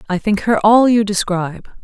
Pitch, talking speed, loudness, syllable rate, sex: 205 Hz, 195 wpm, -14 LUFS, 5.2 syllables/s, female